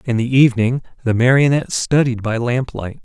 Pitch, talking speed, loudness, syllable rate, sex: 125 Hz, 160 wpm, -16 LUFS, 5.5 syllables/s, male